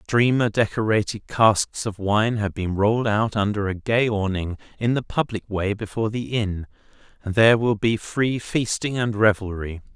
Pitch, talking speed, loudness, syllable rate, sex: 105 Hz, 170 wpm, -22 LUFS, 4.7 syllables/s, male